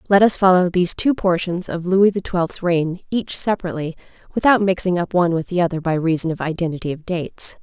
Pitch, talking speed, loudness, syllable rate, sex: 180 Hz, 205 wpm, -19 LUFS, 6.1 syllables/s, female